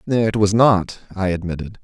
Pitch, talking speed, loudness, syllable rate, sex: 100 Hz, 165 wpm, -18 LUFS, 4.6 syllables/s, male